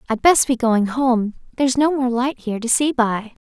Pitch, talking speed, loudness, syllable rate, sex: 250 Hz, 225 wpm, -19 LUFS, 5.0 syllables/s, female